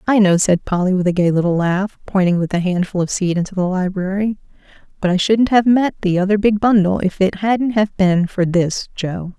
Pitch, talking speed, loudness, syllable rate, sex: 190 Hz, 225 wpm, -17 LUFS, 5.2 syllables/s, female